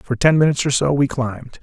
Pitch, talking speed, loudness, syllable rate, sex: 135 Hz, 260 wpm, -18 LUFS, 6.3 syllables/s, male